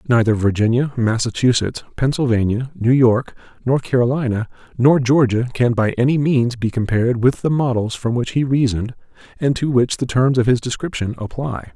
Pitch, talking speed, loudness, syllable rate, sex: 125 Hz, 165 wpm, -18 LUFS, 5.3 syllables/s, male